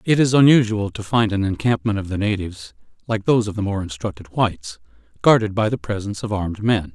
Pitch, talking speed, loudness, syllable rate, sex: 105 Hz, 205 wpm, -20 LUFS, 6.2 syllables/s, male